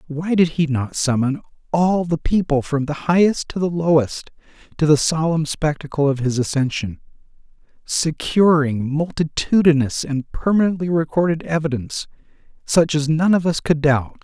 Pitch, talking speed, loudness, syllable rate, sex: 155 Hz, 145 wpm, -19 LUFS, 4.8 syllables/s, male